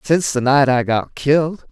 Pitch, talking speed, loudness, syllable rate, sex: 140 Hz, 210 wpm, -16 LUFS, 5.1 syllables/s, male